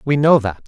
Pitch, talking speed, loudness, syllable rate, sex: 130 Hz, 270 wpm, -15 LUFS, 5.3 syllables/s, male